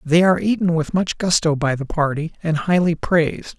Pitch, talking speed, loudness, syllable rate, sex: 165 Hz, 200 wpm, -19 LUFS, 5.3 syllables/s, male